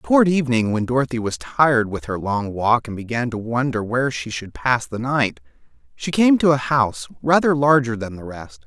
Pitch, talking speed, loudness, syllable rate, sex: 125 Hz, 210 wpm, -20 LUFS, 5.3 syllables/s, male